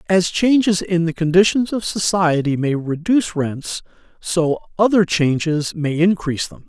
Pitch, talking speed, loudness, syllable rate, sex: 175 Hz, 145 wpm, -18 LUFS, 4.6 syllables/s, male